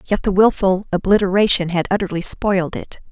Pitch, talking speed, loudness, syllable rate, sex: 190 Hz, 155 wpm, -17 LUFS, 5.6 syllables/s, female